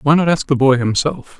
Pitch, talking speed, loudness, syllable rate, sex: 140 Hz, 260 wpm, -15 LUFS, 5.4 syllables/s, male